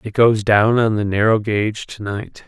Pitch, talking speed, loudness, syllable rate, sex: 105 Hz, 220 wpm, -17 LUFS, 4.6 syllables/s, male